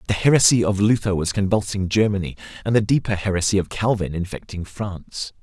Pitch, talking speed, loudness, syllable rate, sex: 100 Hz, 165 wpm, -21 LUFS, 5.9 syllables/s, male